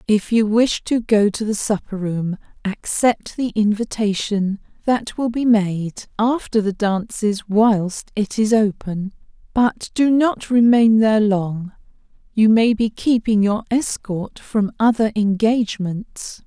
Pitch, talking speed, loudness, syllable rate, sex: 215 Hz, 140 wpm, -19 LUFS, 3.7 syllables/s, female